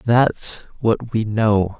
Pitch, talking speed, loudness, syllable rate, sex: 110 Hz, 135 wpm, -19 LUFS, 2.7 syllables/s, female